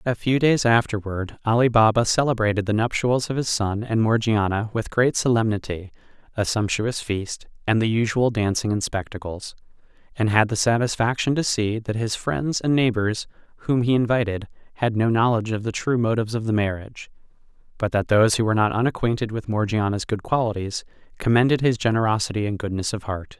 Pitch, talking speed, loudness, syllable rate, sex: 110 Hz, 175 wpm, -22 LUFS, 5.6 syllables/s, male